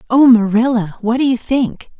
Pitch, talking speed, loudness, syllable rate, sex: 235 Hz, 180 wpm, -14 LUFS, 4.8 syllables/s, female